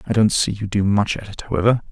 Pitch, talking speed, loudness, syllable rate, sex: 105 Hz, 280 wpm, -19 LUFS, 6.8 syllables/s, male